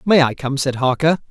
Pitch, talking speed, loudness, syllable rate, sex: 145 Hz, 230 wpm, -18 LUFS, 5.4 syllables/s, male